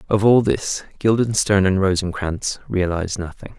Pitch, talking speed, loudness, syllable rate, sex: 100 Hz, 135 wpm, -19 LUFS, 4.7 syllables/s, male